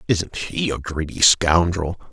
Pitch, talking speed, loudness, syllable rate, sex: 85 Hz, 140 wpm, -19 LUFS, 3.8 syllables/s, male